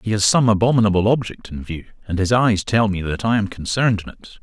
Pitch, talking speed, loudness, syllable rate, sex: 105 Hz, 245 wpm, -18 LUFS, 6.3 syllables/s, male